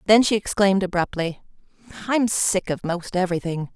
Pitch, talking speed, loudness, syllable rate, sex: 190 Hz, 145 wpm, -22 LUFS, 5.5 syllables/s, female